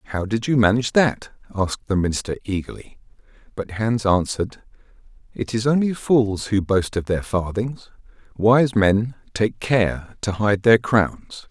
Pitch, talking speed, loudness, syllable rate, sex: 105 Hz, 150 wpm, -21 LUFS, 4.4 syllables/s, male